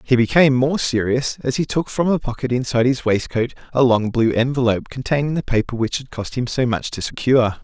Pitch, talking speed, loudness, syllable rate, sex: 125 Hz, 220 wpm, -19 LUFS, 5.9 syllables/s, male